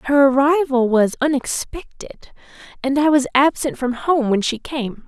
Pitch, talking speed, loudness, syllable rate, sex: 270 Hz, 155 wpm, -18 LUFS, 4.5 syllables/s, female